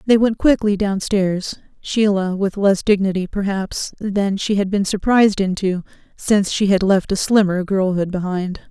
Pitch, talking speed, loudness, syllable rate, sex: 195 Hz, 160 wpm, -18 LUFS, 4.6 syllables/s, female